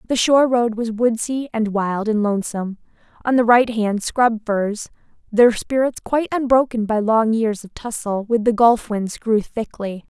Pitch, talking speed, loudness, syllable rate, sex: 225 Hz, 175 wpm, -19 LUFS, 4.6 syllables/s, female